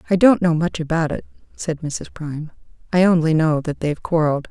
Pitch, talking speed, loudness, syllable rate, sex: 160 Hz, 200 wpm, -19 LUFS, 6.0 syllables/s, female